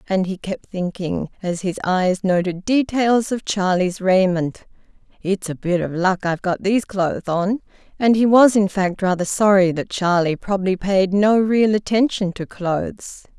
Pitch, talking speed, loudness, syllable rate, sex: 195 Hz, 170 wpm, -19 LUFS, 4.6 syllables/s, female